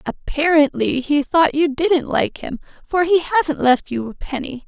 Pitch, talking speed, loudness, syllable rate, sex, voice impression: 300 Hz, 180 wpm, -18 LUFS, 4.6 syllables/s, female, very feminine, slightly young, slightly adult-like, very thin, slightly tensed, weak, slightly dark, hard, clear, fluent, slightly raspy, very cute, very intellectual, very refreshing, sincere, calm, very friendly, very reassuring, unique, very elegant, slightly wild, very sweet, slightly lively, very kind, modest